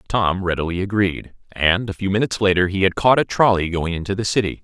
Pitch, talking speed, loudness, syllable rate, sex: 95 Hz, 220 wpm, -19 LUFS, 6.0 syllables/s, male